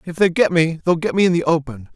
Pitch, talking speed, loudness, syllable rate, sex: 165 Hz, 305 wpm, -17 LUFS, 6.2 syllables/s, male